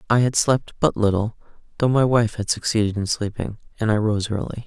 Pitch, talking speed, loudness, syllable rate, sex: 110 Hz, 205 wpm, -21 LUFS, 5.6 syllables/s, male